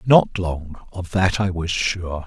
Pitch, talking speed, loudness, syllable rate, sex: 90 Hz, 185 wpm, -21 LUFS, 3.5 syllables/s, male